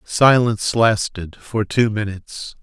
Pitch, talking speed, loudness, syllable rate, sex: 110 Hz, 115 wpm, -18 LUFS, 4.0 syllables/s, male